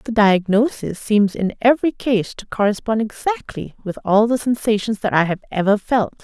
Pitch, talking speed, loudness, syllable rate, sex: 215 Hz, 175 wpm, -19 LUFS, 5.0 syllables/s, female